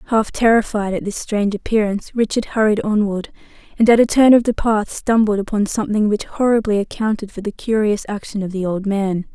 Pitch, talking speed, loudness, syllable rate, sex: 215 Hz, 195 wpm, -18 LUFS, 5.7 syllables/s, female